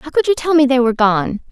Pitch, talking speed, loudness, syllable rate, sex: 270 Hz, 320 wpm, -14 LUFS, 6.4 syllables/s, female